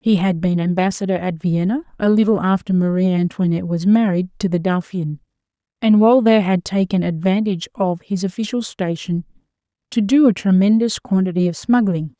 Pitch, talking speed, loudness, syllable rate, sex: 190 Hz, 160 wpm, -18 LUFS, 5.6 syllables/s, female